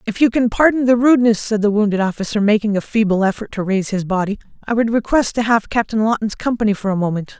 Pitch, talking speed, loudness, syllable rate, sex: 215 Hz, 235 wpm, -17 LUFS, 6.6 syllables/s, female